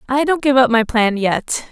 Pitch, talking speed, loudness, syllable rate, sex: 245 Hz, 245 wpm, -15 LUFS, 4.6 syllables/s, female